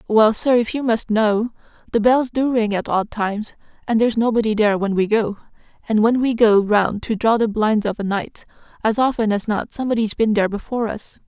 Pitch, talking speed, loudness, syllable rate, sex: 220 Hz, 220 wpm, -19 LUFS, 5.6 syllables/s, female